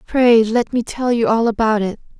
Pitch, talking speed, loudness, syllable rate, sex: 230 Hz, 220 wpm, -16 LUFS, 4.8 syllables/s, female